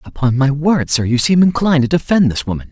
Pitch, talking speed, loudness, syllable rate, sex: 140 Hz, 245 wpm, -14 LUFS, 6.1 syllables/s, male